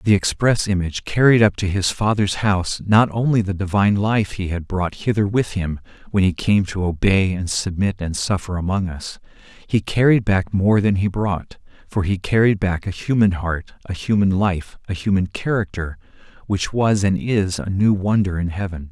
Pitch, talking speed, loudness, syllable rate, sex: 95 Hz, 190 wpm, -19 LUFS, 4.9 syllables/s, male